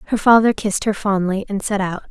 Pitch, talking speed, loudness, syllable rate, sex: 200 Hz, 230 wpm, -18 LUFS, 6.2 syllables/s, female